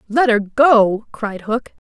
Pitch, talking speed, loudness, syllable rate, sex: 230 Hz, 155 wpm, -16 LUFS, 3.2 syllables/s, female